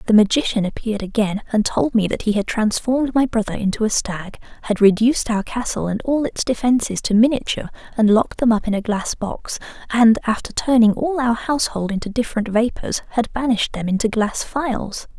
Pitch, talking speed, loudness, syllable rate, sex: 225 Hz, 195 wpm, -19 LUFS, 5.7 syllables/s, female